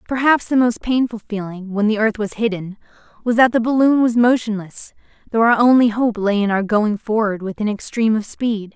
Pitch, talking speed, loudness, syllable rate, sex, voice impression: 220 Hz, 205 wpm, -18 LUFS, 5.3 syllables/s, female, very feminine, slightly young, very thin, very tensed, slightly powerful, very bright, slightly hard, very clear, very fluent, slightly raspy, very cute, slightly intellectual, very refreshing, sincere, slightly calm, very friendly, very reassuring, very unique, slightly elegant, wild, slightly sweet, very lively, slightly kind, intense, sharp, light